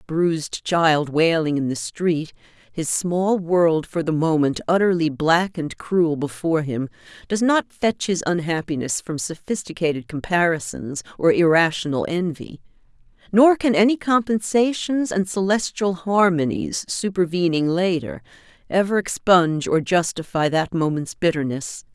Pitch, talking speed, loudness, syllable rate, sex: 170 Hz, 125 wpm, -21 LUFS, 4.4 syllables/s, female